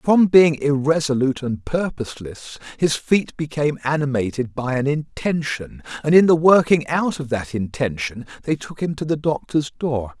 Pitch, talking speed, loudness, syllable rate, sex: 140 Hz, 160 wpm, -20 LUFS, 4.8 syllables/s, male